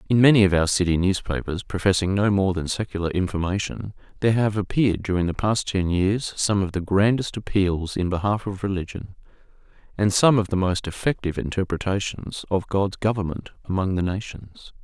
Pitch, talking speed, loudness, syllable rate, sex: 95 Hz, 170 wpm, -23 LUFS, 5.5 syllables/s, male